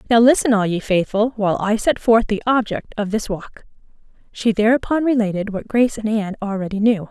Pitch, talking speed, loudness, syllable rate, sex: 215 Hz, 195 wpm, -18 LUFS, 5.8 syllables/s, female